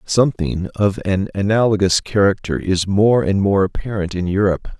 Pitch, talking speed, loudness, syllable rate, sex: 100 Hz, 150 wpm, -17 LUFS, 5.0 syllables/s, male